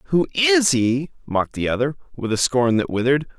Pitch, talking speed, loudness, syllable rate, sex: 140 Hz, 195 wpm, -20 LUFS, 5.6 syllables/s, male